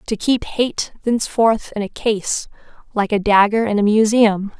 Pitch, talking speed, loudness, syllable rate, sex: 215 Hz, 170 wpm, -17 LUFS, 4.5 syllables/s, female